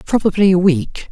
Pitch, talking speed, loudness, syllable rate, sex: 195 Hz, 160 wpm, -14 LUFS, 5.1 syllables/s, female